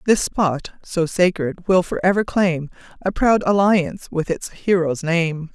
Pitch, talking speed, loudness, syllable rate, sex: 175 Hz, 150 wpm, -20 LUFS, 4.1 syllables/s, female